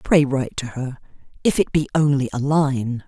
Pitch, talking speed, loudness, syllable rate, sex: 135 Hz, 195 wpm, -21 LUFS, 5.0 syllables/s, female